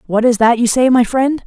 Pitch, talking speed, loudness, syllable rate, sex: 240 Hz, 285 wpm, -13 LUFS, 5.3 syllables/s, female